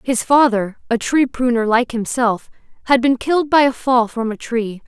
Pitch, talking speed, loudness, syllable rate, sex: 245 Hz, 195 wpm, -17 LUFS, 4.7 syllables/s, female